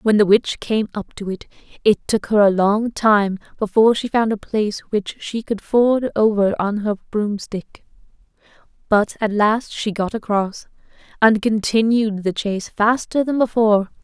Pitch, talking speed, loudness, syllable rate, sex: 215 Hz, 170 wpm, -19 LUFS, 4.4 syllables/s, female